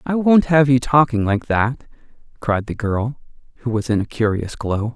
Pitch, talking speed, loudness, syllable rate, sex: 120 Hz, 195 wpm, -18 LUFS, 4.6 syllables/s, male